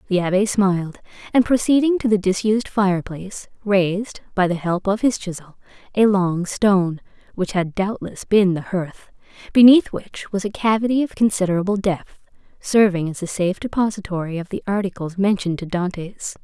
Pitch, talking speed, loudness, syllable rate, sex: 195 Hz, 160 wpm, -20 LUFS, 5.3 syllables/s, female